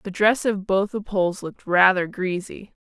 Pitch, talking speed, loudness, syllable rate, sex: 195 Hz, 190 wpm, -21 LUFS, 4.9 syllables/s, female